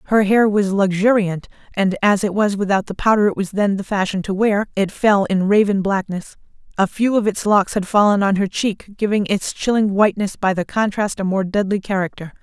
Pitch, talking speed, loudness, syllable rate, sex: 200 Hz, 210 wpm, -18 LUFS, 5.3 syllables/s, female